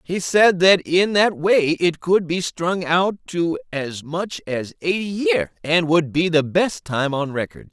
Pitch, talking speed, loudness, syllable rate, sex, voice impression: 170 Hz, 195 wpm, -19 LUFS, 3.8 syllables/s, male, masculine, middle-aged, tensed, powerful, bright, clear, slightly nasal, mature, unique, wild, lively, slightly intense